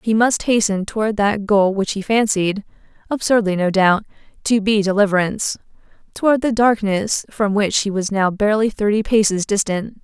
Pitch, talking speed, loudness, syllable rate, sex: 205 Hz, 160 wpm, -18 LUFS, 4.8 syllables/s, female